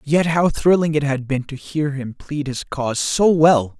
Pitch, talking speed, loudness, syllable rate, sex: 145 Hz, 220 wpm, -19 LUFS, 4.4 syllables/s, male